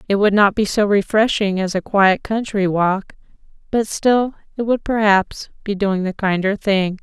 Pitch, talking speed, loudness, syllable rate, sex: 205 Hz, 180 wpm, -18 LUFS, 4.4 syllables/s, female